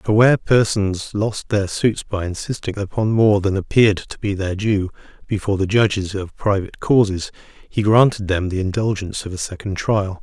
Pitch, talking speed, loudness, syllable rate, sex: 100 Hz, 180 wpm, -19 LUFS, 5.2 syllables/s, male